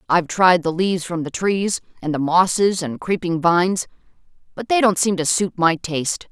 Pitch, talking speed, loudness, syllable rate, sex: 175 Hz, 200 wpm, -19 LUFS, 5.1 syllables/s, female